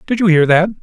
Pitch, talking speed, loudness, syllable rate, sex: 180 Hz, 290 wpm, -12 LUFS, 6.9 syllables/s, male